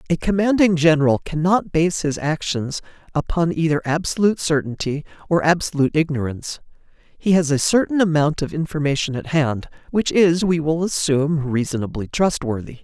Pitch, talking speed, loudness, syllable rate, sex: 155 Hz, 140 wpm, -20 LUFS, 5.4 syllables/s, male